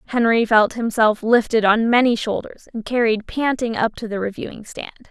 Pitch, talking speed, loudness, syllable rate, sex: 225 Hz, 175 wpm, -18 LUFS, 5.1 syllables/s, female